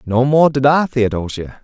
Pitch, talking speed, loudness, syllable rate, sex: 130 Hz, 185 wpm, -15 LUFS, 4.6 syllables/s, male